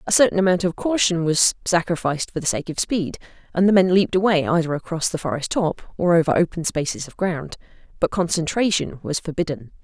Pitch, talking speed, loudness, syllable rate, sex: 170 Hz, 195 wpm, -21 LUFS, 6.0 syllables/s, female